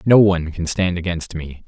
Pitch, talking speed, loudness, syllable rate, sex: 90 Hz, 215 wpm, -19 LUFS, 5.1 syllables/s, male